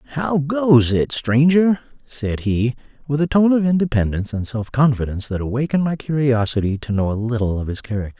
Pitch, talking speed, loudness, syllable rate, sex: 130 Hz, 185 wpm, -19 LUFS, 5.7 syllables/s, male